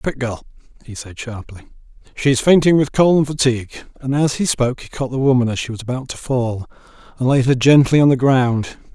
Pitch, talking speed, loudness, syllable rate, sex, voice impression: 130 Hz, 220 wpm, -17 LUFS, 5.8 syllables/s, male, very masculine, very adult-like, very middle-aged, thick, tensed, very powerful, slightly bright, slightly muffled, fluent, slightly raspy, very cool, very intellectual, slightly refreshing, very sincere, calm, very mature, very friendly, very reassuring, slightly unique, very elegant, sweet, slightly lively, very kind